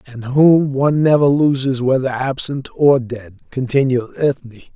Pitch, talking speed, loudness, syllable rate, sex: 130 Hz, 140 wpm, -16 LUFS, 4.5 syllables/s, male